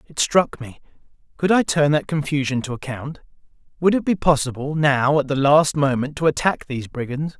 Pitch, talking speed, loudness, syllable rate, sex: 145 Hz, 180 wpm, -20 LUFS, 5.3 syllables/s, male